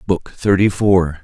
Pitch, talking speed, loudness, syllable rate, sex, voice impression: 95 Hz, 145 wpm, -16 LUFS, 3.8 syllables/s, male, masculine, adult-like, relaxed, weak, dark, halting, calm, slightly reassuring, wild, kind, modest